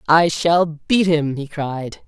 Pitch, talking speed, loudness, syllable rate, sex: 160 Hz, 175 wpm, -18 LUFS, 3.1 syllables/s, female